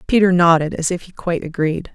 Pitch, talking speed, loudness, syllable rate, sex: 170 Hz, 215 wpm, -17 LUFS, 6.1 syllables/s, female